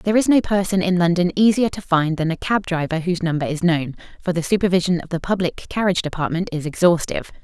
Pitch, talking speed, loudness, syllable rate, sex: 180 Hz, 220 wpm, -20 LUFS, 6.5 syllables/s, female